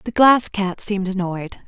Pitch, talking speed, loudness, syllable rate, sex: 200 Hz, 180 wpm, -18 LUFS, 4.7 syllables/s, female